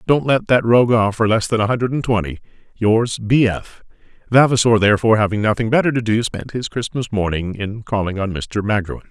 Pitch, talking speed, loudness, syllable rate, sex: 110 Hz, 200 wpm, -17 LUFS, 5.8 syllables/s, male